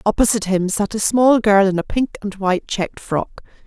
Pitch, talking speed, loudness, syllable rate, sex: 205 Hz, 215 wpm, -18 LUFS, 5.5 syllables/s, female